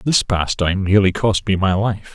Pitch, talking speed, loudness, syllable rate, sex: 100 Hz, 195 wpm, -17 LUFS, 4.9 syllables/s, male